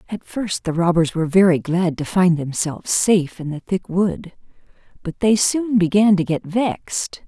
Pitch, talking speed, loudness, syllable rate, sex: 180 Hz, 180 wpm, -19 LUFS, 4.7 syllables/s, female